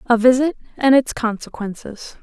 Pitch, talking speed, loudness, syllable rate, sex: 240 Hz, 135 wpm, -18 LUFS, 4.8 syllables/s, female